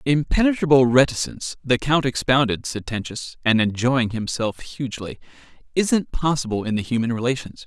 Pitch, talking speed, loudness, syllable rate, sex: 130 Hz, 110 wpm, -21 LUFS, 5.3 syllables/s, male